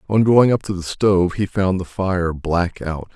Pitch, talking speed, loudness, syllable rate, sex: 95 Hz, 230 wpm, -19 LUFS, 4.5 syllables/s, male